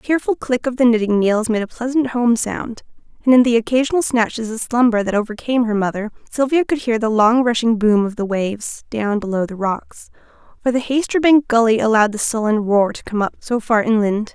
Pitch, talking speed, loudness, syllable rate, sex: 230 Hz, 215 wpm, -17 LUFS, 5.7 syllables/s, female